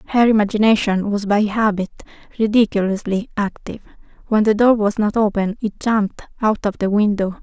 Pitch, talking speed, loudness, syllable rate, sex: 210 Hz, 155 wpm, -18 LUFS, 5.5 syllables/s, female